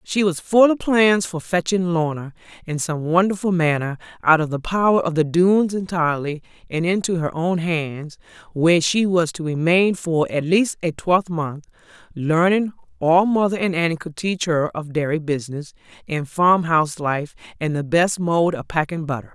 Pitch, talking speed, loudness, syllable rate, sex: 170 Hz, 180 wpm, -20 LUFS, 4.9 syllables/s, female